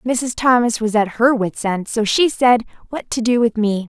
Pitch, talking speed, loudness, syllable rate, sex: 230 Hz, 225 wpm, -17 LUFS, 4.6 syllables/s, female